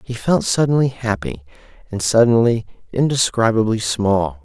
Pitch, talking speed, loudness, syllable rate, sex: 115 Hz, 110 wpm, -17 LUFS, 4.8 syllables/s, male